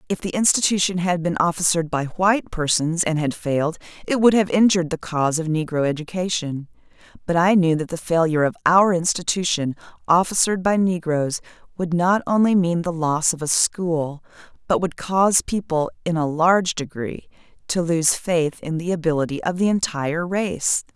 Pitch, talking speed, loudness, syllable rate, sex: 170 Hz, 170 wpm, -20 LUFS, 5.3 syllables/s, female